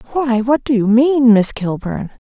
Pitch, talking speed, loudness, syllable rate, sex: 240 Hz, 185 wpm, -14 LUFS, 4.3 syllables/s, female